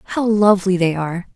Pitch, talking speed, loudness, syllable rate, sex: 190 Hz, 180 wpm, -17 LUFS, 5.5 syllables/s, female